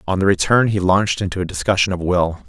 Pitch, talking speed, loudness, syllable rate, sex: 95 Hz, 240 wpm, -17 LUFS, 6.5 syllables/s, male